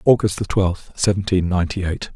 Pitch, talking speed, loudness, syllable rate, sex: 95 Hz, 140 wpm, -20 LUFS, 4.9 syllables/s, male